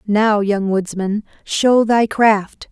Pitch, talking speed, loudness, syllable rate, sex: 210 Hz, 130 wpm, -16 LUFS, 2.9 syllables/s, female